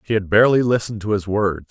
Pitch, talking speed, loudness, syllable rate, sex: 105 Hz, 245 wpm, -18 LUFS, 7.1 syllables/s, male